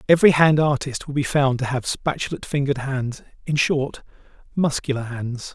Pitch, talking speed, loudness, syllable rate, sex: 135 Hz, 150 wpm, -21 LUFS, 5.4 syllables/s, male